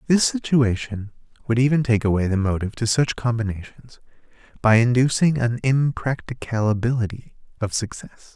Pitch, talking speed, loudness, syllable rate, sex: 120 Hz, 120 wpm, -21 LUFS, 5.0 syllables/s, male